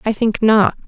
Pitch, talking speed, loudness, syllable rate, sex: 215 Hz, 205 wpm, -15 LUFS, 4.4 syllables/s, female